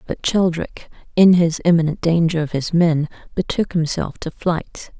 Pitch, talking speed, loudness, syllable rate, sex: 165 Hz, 155 wpm, -18 LUFS, 4.7 syllables/s, female